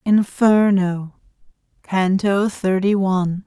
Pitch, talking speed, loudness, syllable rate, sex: 195 Hz, 70 wpm, -18 LUFS, 3.3 syllables/s, female